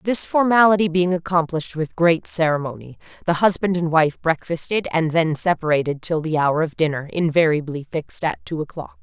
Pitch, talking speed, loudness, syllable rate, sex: 165 Hz, 165 wpm, -20 LUFS, 5.4 syllables/s, female